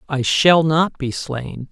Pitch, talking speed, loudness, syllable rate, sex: 145 Hz, 175 wpm, -17 LUFS, 3.3 syllables/s, male